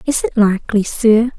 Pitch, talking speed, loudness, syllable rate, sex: 220 Hz, 175 wpm, -15 LUFS, 4.9 syllables/s, female